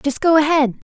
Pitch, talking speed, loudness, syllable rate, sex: 290 Hz, 190 wpm, -16 LUFS, 5.5 syllables/s, female